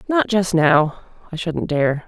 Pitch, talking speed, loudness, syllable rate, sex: 175 Hz, 145 wpm, -18 LUFS, 3.7 syllables/s, female